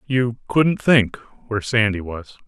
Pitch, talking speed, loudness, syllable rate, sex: 115 Hz, 145 wpm, -19 LUFS, 4.1 syllables/s, male